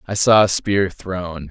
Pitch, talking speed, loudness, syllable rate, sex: 95 Hz, 200 wpm, -17 LUFS, 3.7 syllables/s, male